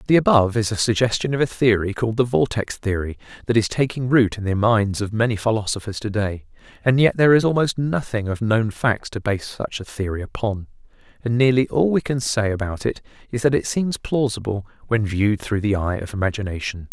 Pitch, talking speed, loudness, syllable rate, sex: 110 Hz, 210 wpm, -21 LUFS, 5.7 syllables/s, male